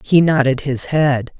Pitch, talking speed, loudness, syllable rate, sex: 140 Hz, 175 wpm, -16 LUFS, 3.9 syllables/s, female